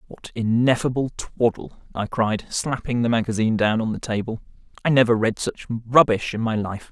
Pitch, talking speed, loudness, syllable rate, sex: 115 Hz, 175 wpm, -22 LUFS, 5.2 syllables/s, male